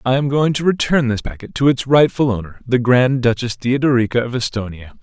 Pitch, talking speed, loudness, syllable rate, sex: 125 Hz, 205 wpm, -17 LUFS, 5.6 syllables/s, male